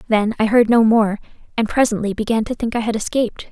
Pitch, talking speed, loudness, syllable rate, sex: 220 Hz, 220 wpm, -18 LUFS, 6.3 syllables/s, female